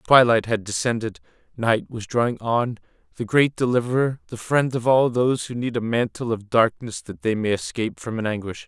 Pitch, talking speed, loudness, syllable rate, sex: 115 Hz, 195 wpm, -22 LUFS, 5.4 syllables/s, male